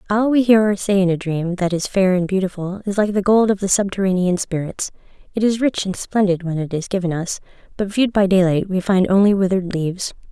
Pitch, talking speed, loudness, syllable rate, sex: 190 Hz, 235 wpm, -18 LUFS, 5.9 syllables/s, female